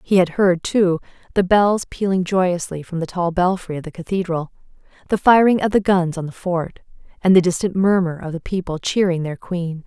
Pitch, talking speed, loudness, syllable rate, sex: 180 Hz, 200 wpm, -19 LUFS, 5.1 syllables/s, female